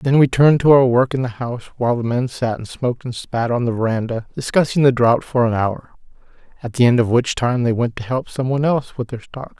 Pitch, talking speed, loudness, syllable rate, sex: 125 Hz, 255 wpm, -18 LUFS, 6.1 syllables/s, male